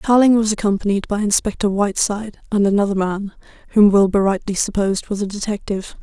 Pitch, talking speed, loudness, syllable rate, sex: 205 Hz, 160 wpm, -18 LUFS, 6.3 syllables/s, female